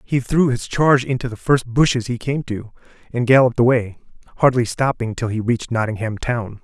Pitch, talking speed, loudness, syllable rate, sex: 120 Hz, 190 wpm, -19 LUFS, 5.7 syllables/s, male